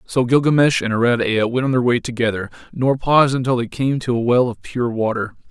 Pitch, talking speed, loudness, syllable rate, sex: 125 Hz, 230 wpm, -18 LUFS, 5.8 syllables/s, male